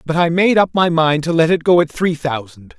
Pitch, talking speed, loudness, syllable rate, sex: 160 Hz, 280 wpm, -15 LUFS, 5.3 syllables/s, male